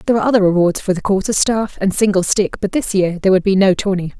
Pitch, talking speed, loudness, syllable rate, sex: 195 Hz, 270 wpm, -15 LUFS, 6.9 syllables/s, female